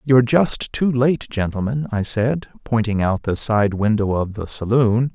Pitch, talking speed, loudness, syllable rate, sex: 115 Hz, 175 wpm, -19 LUFS, 4.4 syllables/s, male